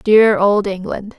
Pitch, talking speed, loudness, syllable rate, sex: 205 Hz, 150 wpm, -14 LUFS, 3.5 syllables/s, female